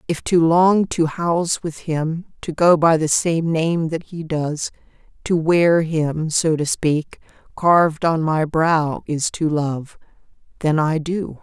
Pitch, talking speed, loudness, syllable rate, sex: 160 Hz, 170 wpm, -19 LUFS, 3.6 syllables/s, female